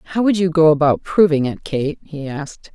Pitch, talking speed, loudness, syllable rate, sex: 160 Hz, 220 wpm, -17 LUFS, 5.4 syllables/s, female